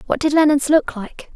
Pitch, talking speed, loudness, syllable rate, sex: 290 Hz, 220 wpm, -16 LUFS, 5.0 syllables/s, female